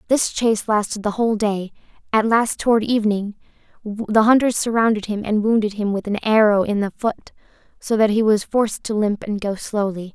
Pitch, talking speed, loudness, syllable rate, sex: 215 Hz, 195 wpm, -19 LUFS, 5.4 syllables/s, female